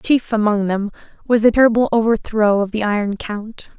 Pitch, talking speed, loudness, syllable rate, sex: 215 Hz, 175 wpm, -17 LUFS, 5.1 syllables/s, female